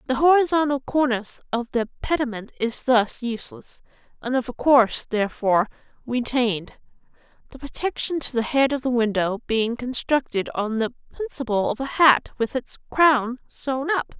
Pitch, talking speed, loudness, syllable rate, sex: 250 Hz, 150 wpm, -22 LUFS, 4.9 syllables/s, female